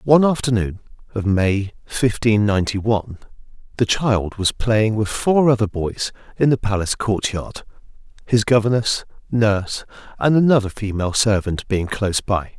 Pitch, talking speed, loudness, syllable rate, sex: 110 Hz, 140 wpm, -19 LUFS, 4.9 syllables/s, male